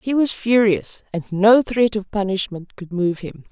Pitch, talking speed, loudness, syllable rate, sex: 205 Hz, 190 wpm, -19 LUFS, 4.2 syllables/s, female